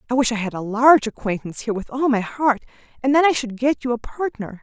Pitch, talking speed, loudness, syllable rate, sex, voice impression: 240 Hz, 260 wpm, -20 LUFS, 6.4 syllables/s, female, very feminine, very adult-like, middle-aged, very thin, very tensed, very powerful, very bright, very hard, very clear, very fluent, slightly cool, intellectual, very refreshing, sincere, calm, slightly friendly, slightly reassuring, very unique, slightly elegant, wild, slightly sweet, lively, very strict, intense, very sharp